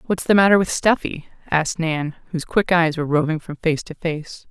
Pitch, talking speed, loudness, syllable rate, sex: 165 Hz, 215 wpm, -20 LUFS, 5.6 syllables/s, female